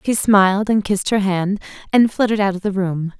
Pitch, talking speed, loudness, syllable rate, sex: 200 Hz, 225 wpm, -17 LUFS, 5.9 syllables/s, female